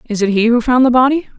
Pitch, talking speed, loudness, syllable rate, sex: 240 Hz, 305 wpm, -13 LUFS, 6.6 syllables/s, female